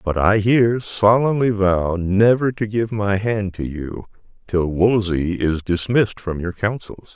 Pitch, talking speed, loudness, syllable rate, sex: 100 Hz, 160 wpm, -19 LUFS, 4.1 syllables/s, male